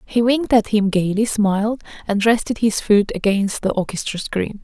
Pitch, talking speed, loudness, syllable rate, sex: 210 Hz, 180 wpm, -19 LUFS, 5.0 syllables/s, female